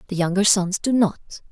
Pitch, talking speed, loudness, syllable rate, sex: 195 Hz, 200 wpm, -20 LUFS, 5.8 syllables/s, female